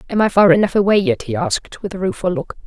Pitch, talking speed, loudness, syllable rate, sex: 190 Hz, 270 wpm, -16 LUFS, 6.6 syllables/s, female